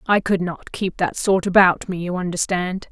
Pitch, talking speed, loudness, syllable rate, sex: 185 Hz, 205 wpm, -20 LUFS, 4.7 syllables/s, female